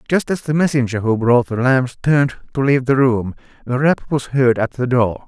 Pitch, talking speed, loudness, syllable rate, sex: 130 Hz, 230 wpm, -17 LUFS, 5.3 syllables/s, male